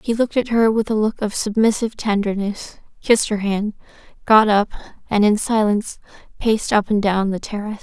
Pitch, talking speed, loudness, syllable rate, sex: 210 Hz, 185 wpm, -19 LUFS, 5.8 syllables/s, female